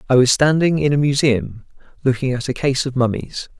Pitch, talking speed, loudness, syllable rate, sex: 130 Hz, 200 wpm, -18 LUFS, 5.4 syllables/s, male